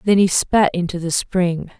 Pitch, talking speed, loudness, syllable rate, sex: 180 Hz, 200 wpm, -18 LUFS, 4.5 syllables/s, female